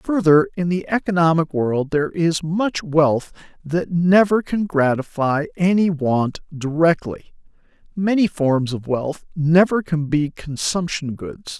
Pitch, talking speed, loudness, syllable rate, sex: 165 Hz, 130 wpm, -19 LUFS, 3.9 syllables/s, male